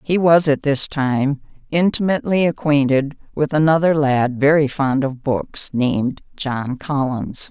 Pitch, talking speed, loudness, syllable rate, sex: 145 Hz, 135 wpm, -18 LUFS, 4.1 syllables/s, female